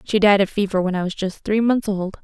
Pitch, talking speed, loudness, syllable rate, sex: 200 Hz, 295 wpm, -20 LUFS, 5.7 syllables/s, female